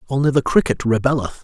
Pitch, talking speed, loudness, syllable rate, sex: 130 Hz, 165 wpm, -18 LUFS, 6.7 syllables/s, male